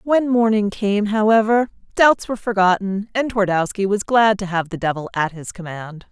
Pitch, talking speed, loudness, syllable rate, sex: 205 Hz, 175 wpm, -18 LUFS, 4.9 syllables/s, female